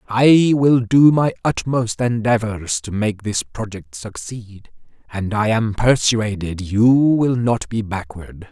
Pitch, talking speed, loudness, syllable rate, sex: 110 Hz, 140 wpm, -17 LUFS, 3.6 syllables/s, male